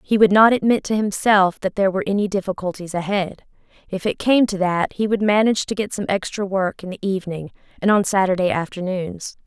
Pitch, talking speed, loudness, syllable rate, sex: 195 Hz, 205 wpm, -20 LUFS, 5.9 syllables/s, female